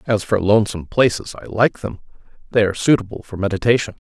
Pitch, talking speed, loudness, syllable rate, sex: 105 Hz, 175 wpm, -18 LUFS, 6.8 syllables/s, male